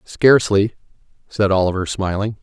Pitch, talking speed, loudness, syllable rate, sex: 100 Hz, 100 wpm, -17 LUFS, 5.1 syllables/s, male